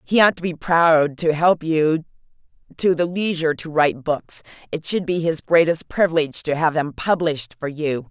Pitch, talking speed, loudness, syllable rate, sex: 160 Hz, 190 wpm, -20 LUFS, 5.0 syllables/s, female